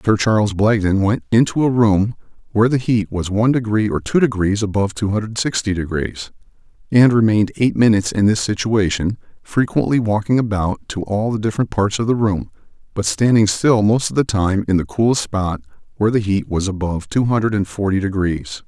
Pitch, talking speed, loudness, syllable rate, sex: 105 Hz, 190 wpm, -17 LUFS, 5.6 syllables/s, male